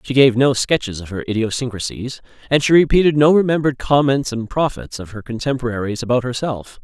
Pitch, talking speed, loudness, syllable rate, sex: 125 Hz, 175 wpm, -17 LUFS, 5.9 syllables/s, male